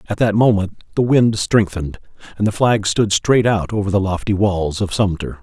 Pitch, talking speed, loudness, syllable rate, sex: 100 Hz, 200 wpm, -17 LUFS, 5.1 syllables/s, male